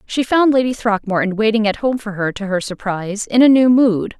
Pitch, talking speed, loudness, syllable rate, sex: 220 Hz, 230 wpm, -16 LUFS, 5.5 syllables/s, female